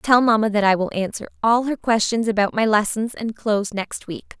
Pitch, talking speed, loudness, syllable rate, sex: 215 Hz, 220 wpm, -20 LUFS, 5.2 syllables/s, female